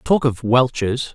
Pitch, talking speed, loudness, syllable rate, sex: 125 Hz, 155 wpm, -18 LUFS, 3.6 syllables/s, male